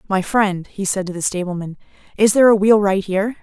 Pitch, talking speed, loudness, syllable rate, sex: 200 Hz, 210 wpm, -17 LUFS, 6.1 syllables/s, female